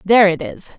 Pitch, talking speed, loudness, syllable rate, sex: 190 Hz, 230 wpm, -15 LUFS, 6.4 syllables/s, female